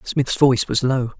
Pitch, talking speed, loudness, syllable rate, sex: 130 Hz, 200 wpm, -18 LUFS, 4.7 syllables/s, male